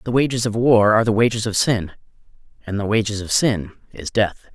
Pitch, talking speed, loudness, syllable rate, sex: 110 Hz, 210 wpm, -19 LUFS, 5.8 syllables/s, male